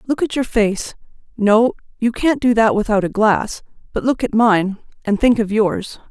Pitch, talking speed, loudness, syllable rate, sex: 220 Hz, 175 wpm, -17 LUFS, 4.5 syllables/s, female